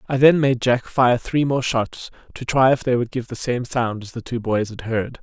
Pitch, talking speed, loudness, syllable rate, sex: 125 Hz, 265 wpm, -20 LUFS, 4.8 syllables/s, male